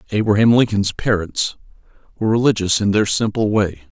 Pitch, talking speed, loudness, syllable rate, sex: 105 Hz, 135 wpm, -17 LUFS, 5.5 syllables/s, male